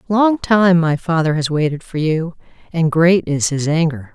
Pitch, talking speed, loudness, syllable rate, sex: 165 Hz, 190 wpm, -16 LUFS, 4.4 syllables/s, female